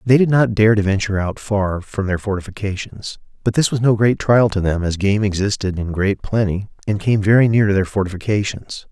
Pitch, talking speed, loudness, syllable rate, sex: 100 Hz, 210 wpm, -18 LUFS, 5.4 syllables/s, male